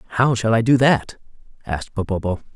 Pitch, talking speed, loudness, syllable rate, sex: 110 Hz, 165 wpm, -19 LUFS, 6.3 syllables/s, male